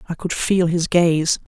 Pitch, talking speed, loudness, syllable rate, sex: 170 Hz, 195 wpm, -19 LUFS, 4.0 syllables/s, female